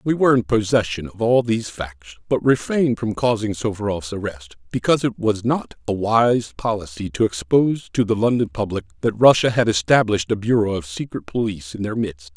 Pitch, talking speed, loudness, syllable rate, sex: 105 Hz, 190 wpm, -20 LUFS, 5.6 syllables/s, male